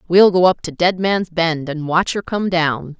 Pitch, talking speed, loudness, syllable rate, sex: 170 Hz, 240 wpm, -17 LUFS, 4.2 syllables/s, female